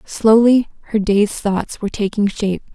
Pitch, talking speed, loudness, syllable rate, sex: 210 Hz, 155 wpm, -17 LUFS, 4.7 syllables/s, female